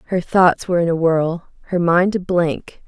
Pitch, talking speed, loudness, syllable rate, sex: 175 Hz, 190 wpm, -17 LUFS, 4.6 syllables/s, female